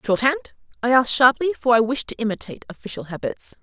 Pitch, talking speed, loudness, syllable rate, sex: 245 Hz, 180 wpm, -20 LUFS, 7.0 syllables/s, female